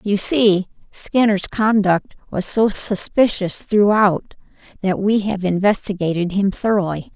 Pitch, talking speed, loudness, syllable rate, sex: 195 Hz, 115 wpm, -18 LUFS, 4.0 syllables/s, female